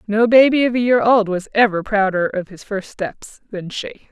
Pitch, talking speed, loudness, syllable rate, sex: 210 Hz, 220 wpm, -17 LUFS, 4.7 syllables/s, female